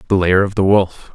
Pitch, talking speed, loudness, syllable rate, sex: 95 Hz, 260 wpm, -15 LUFS, 5.3 syllables/s, male